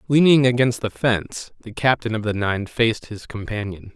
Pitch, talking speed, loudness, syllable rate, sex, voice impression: 110 Hz, 180 wpm, -20 LUFS, 5.2 syllables/s, male, very masculine, adult-like, middle-aged, thick, tensed, powerful, slightly bright, slightly soft, very clear, slightly muffled, fluent, cool, very intellectual, refreshing, very sincere, very calm, slightly mature, friendly, reassuring, unique, elegant, slightly wild, sweet, slightly lively, kind